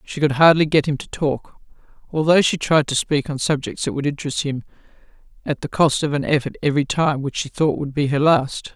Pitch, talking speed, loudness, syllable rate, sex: 145 Hz, 225 wpm, -19 LUFS, 5.7 syllables/s, female